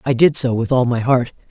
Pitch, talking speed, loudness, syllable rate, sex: 125 Hz, 280 wpm, -16 LUFS, 5.5 syllables/s, female